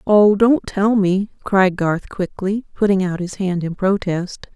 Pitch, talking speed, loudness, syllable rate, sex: 195 Hz, 170 wpm, -18 LUFS, 4.0 syllables/s, female